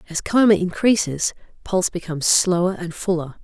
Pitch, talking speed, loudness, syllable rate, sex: 180 Hz, 140 wpm, -20 LUFS, 5.4 syllables/s, female